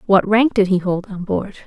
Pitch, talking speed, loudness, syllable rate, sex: 200 Hz, 255 wpm, -18 LUFS, 5.0 syllables/s, female